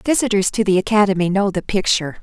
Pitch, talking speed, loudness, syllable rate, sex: 195 Hz, 190 wpm, -17 LUFS, 6.7 syllables/s, female